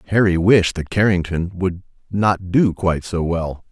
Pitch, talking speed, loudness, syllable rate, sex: 90 Hz, 160 wpm, -18 LUFS, 4.4 syllables/s, male